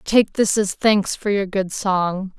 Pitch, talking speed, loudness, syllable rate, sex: 200 Hz, 200 wpm, -19 LUFS, 3.5 syllables/s, female